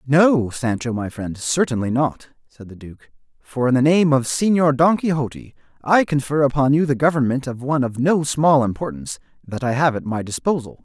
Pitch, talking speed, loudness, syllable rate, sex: 135 Hz, 195 wpm, -19 LUFS, 5.2 syllables/s, male